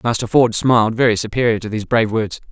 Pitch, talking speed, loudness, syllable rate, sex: 115 Hz, 215 wpm, -16 LUFS, 6.8 syllables/s, male